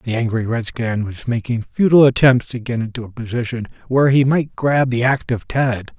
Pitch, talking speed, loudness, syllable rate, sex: 120 Hz, 190 wpm, -18 LUFS, 5.5 syllables/s, male